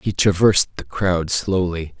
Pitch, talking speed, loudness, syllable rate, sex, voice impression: 90 Hz, 150 wpm, -19 LUFS, 4.4 syllables/s, male, very masculine, very adult-like, slightly middle-aged, thick, tensed, very powerful, bright, slightly hard, clear, fluent, very cool, intellectual, refreshing, very sincere, very calm, mature, very friendly, very reassuring, unique, very elegant, slightly wild, very sweet, lively, kind, slightly modest